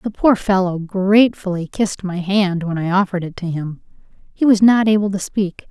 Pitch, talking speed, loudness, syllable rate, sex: 190 Hz, 190 wpm, -17 LUFS, 5.3 syllables/s, female